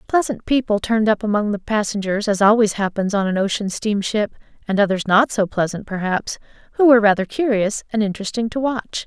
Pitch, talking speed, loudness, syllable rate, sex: 210 Hz, 185 wpm, -19 LUFS, 5.8 syllables/s, female